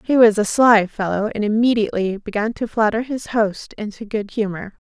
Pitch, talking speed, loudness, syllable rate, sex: 215 Hz, 185 wpm, -19 LUFS, 5.1 syllables/s, female